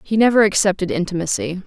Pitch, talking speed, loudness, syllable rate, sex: 190 Hz, 145 wpm, -17 LUFS, 6.4 syllables/s, female